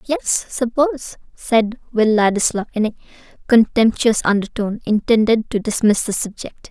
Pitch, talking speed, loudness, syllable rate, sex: 225 Hz, 125 wpm, -17 LUFS, 4.8 syllables/s, female